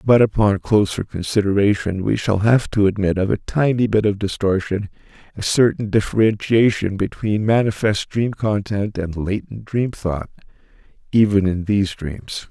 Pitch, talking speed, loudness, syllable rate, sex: 105 Hz, 145 wpm, -19 LUFS, 4.7 syllables/s, male